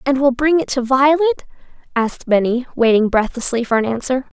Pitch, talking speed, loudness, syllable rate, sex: 255 Hz, 180 wpm, -16 LUFS, 5.5 syllables/s, female